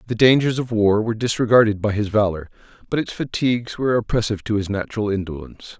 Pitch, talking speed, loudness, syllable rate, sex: 110 Hz, 185 wpm, -20 LUFS, 6.8 syllables/s, male